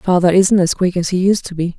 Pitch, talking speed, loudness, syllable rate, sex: 180 Hz, 300 wpm, -15 LUFS, 5.7 syllables/s, female